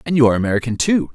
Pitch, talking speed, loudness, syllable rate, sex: 135 Hz, 260 wpm, -17 LUFS, 8.7 syllables/s, male